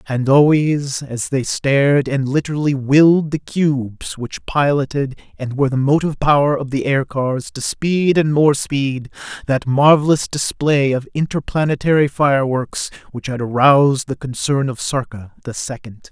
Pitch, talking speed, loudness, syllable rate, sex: 140 Hz, 150 wpm, -17 LUFS, 4.6 syllables/s, male